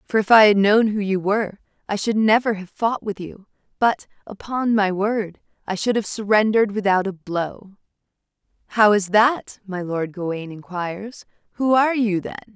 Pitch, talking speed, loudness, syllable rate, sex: 205 Hz, 175 wpm, -20 LUFS, 4.8 syllables/s, female